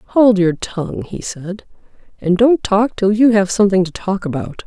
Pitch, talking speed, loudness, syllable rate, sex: 200 Hz, 195 wpm, -16 LUFS, 4.6 syllables/s, female